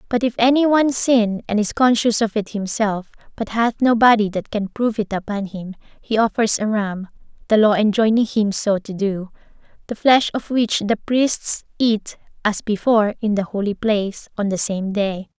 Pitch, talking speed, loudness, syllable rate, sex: 215 Hz, 185 wpm, -19 LUFS, 4.9 syllables/s, female